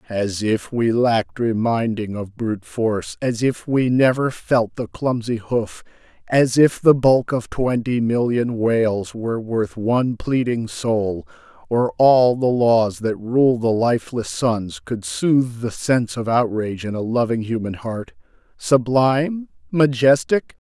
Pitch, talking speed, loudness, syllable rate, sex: 115 Hz, 150 wpm, -19 LUFS, 4.1 syllables/s, male